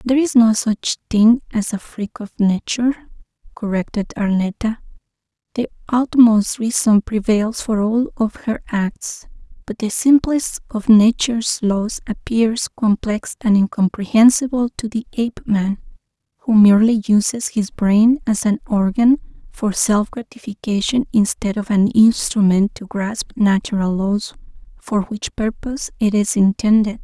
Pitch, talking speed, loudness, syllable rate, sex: 220 Hz, 130 wpm, -17 LUFS, 4.3 syllables/s, female